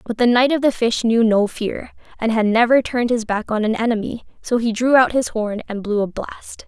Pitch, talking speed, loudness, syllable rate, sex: 230 Hz, 250 wpm, -18 LUFS, 5.3 syllables/s, female